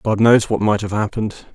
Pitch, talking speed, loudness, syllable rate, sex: 105 Hz, 235 wpm, -17 LUFS, 5.5 syllables/s, male